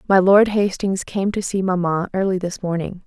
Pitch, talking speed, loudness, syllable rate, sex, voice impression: 190 Hz, 195 wpm, -19 LUFS, 4.9 syllables/s, female, feminine, adult-like, slightly soft, calm